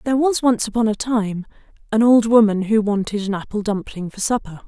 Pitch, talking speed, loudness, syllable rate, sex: 215 Hz, 205 wpm, -19 LUFS, 5.6 syllables/s, female